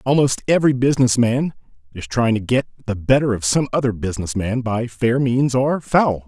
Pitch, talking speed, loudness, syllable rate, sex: 120 Hz, 180 wpm, -19 LUFS, 5.4 syllables/s, male